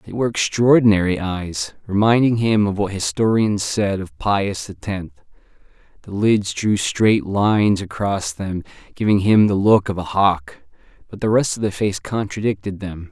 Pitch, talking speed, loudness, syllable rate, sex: 100 Hz, 165 wpm, -19 LUFS, 4.6 syllables/s, male